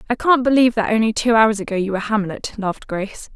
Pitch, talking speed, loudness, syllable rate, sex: 220 Hz, 230 wpm, -18 LUFS, 6.8 syllables/s, female